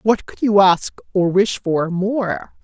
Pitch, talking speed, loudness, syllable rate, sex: 195 Hz, 180 wpm, -18 LUFS, 3.8 syllables/s, male